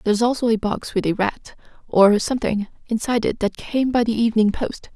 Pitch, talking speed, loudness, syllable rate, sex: 225 Hz, 205 wpm, -20 LUFS, 5.8 syllables/s, female